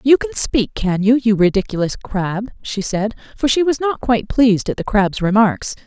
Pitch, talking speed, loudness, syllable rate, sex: 220 Hz, 205 wpm, -17 LUFS, 5.0 syllables/s, female